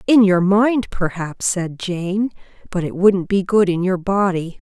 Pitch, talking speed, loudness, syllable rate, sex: 190 Hz, 180 wpm, -18 LUFS, 4.0 syllables/s, female